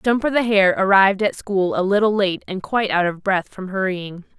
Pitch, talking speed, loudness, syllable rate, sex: 195 Hz, 220 wpm, -19 LUFS, 5.3 syllables/s, female